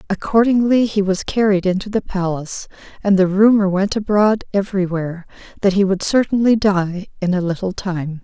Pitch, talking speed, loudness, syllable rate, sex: 195 Hz, 170 wpm, -17 LUFS, 5.3 syllables/s, female